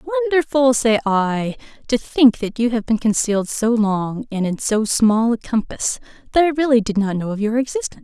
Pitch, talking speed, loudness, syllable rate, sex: 220 Hz, 200 wpm, -18 LUFS, 5.5 syllables/s, female